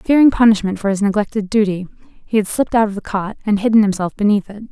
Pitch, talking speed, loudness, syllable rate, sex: 205 Hz, 230 wpm, -16 LUFS, 6.6 syllables/s, female